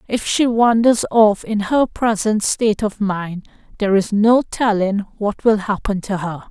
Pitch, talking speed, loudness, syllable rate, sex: 210 Hz, 175 wpm, -17 LUFS, 4.3 syllables/s, female